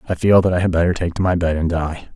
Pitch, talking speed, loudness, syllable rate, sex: 85 Hz, 335 wpm, -18 LUFS, 6.7 syllables/s, male